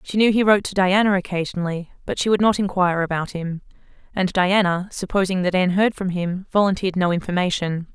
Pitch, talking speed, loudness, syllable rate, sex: 185 Hz, 190 wpm, -20 LUFS, 6.2 syllables/s, female